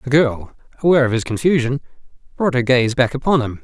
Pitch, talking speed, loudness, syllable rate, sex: 130 Hz, 200 wpm, -17 LUFS, 6.3 syllables/s, male